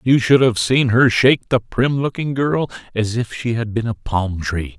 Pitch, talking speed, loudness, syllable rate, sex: 115 Hz, 225 wpm, -18 LUFS, 4.5 syllables/s, male